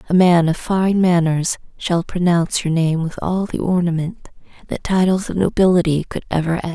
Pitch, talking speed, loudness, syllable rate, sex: 175 Hz, 180 wpm, -18 LUFS, 5.1 syllables/s, female